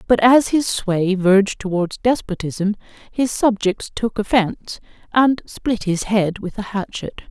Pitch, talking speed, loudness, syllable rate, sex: 210 Hz, 150 wpm, -19 LUFS, 4.1 syllables/s, female